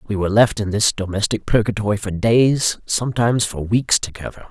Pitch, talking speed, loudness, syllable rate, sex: 105 Hz, 175 wpm, -18 LUFS, 5.4 syllables/s, male